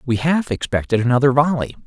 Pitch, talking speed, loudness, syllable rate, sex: 135 Hz, 160 wpm, -18 LUFS, 6.0 syllables/s, male